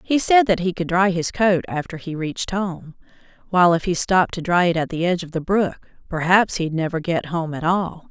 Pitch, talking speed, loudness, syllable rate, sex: 175 Hz, 235 wpm, -20 LUFS, 5.5 syllables/s, female